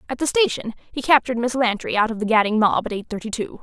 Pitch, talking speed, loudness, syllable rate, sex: 235 Hz, 265 wpm, -20 LUFS, 6.6 syllables/s, female